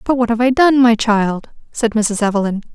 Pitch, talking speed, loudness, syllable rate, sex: 230 Hz, 220 wpm, -15 LUFS, 5.1 syllables/s, female